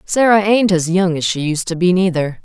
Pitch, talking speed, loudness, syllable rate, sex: 180 Hz, 245 wpm, -15 LUFS, 5.2 syllables/s, female